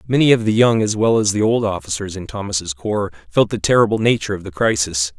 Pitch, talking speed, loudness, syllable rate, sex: 100 Hz, 230 wpm, -18 LUFS, 6.0 syllables/s, male